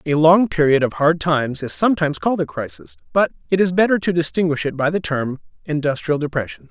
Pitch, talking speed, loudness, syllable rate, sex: 155 Hz, 205 wpm, -19 LUFS, 6.2 syllables/s, male